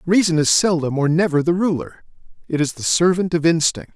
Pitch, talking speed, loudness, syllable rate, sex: 165 Hz, 195 wpm, -18 LUFS, 5.6 syllables/s, male